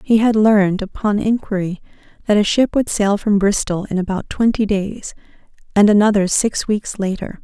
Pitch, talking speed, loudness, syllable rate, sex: 205 Hz, 170 wpm, -17 LUFS, 5.0 syllables/s, female